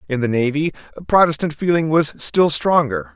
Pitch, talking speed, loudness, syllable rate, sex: 145 Hz, 150 wpm, -17 LUFS, 5.0 syllables/s, male